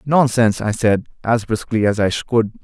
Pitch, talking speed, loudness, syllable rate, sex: 115 Hz, 180 wpm, -18 LUFS, 5.1 syllables/s, male